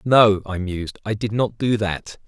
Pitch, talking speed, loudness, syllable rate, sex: 105 Hz, 210 wpm, -21 LUFS, 4.4 syllables/s, male